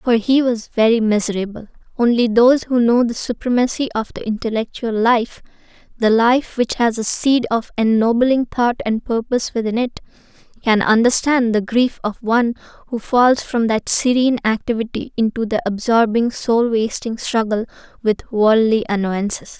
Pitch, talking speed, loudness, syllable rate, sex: 230 Hz, 145 wpm, -17 LUFS, 4.9 syllables/s, female